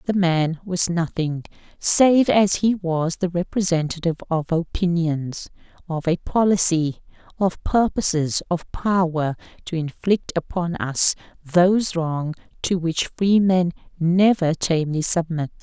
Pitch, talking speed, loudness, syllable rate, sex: 175 Hz, 120 wpm, -21 LUFS, 4.1 syllables/s, female